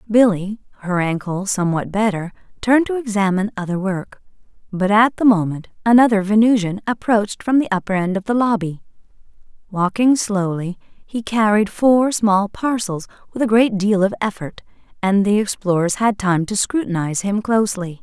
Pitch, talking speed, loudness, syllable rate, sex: 205 Hz, 155 wpm, -18 LUFS, 5.2 syllables/s, female